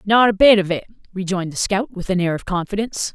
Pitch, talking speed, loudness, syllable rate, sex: 195 Hz, 250 wpm, -19 LUFS, 6.5 syllables/s, female